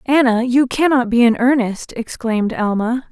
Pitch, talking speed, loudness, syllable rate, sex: 240 Hz, 155 wpm, -16 LUFS, 4.9 syllables/s, female